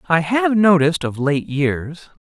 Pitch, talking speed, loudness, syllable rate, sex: 165 Hz, 160 wpm, -17 LUFS, 4.1 syllables/s, male